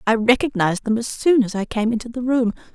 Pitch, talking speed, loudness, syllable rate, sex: 230 Hz, 240 wpm, -20 LUFS, 6.2 syllables/s, female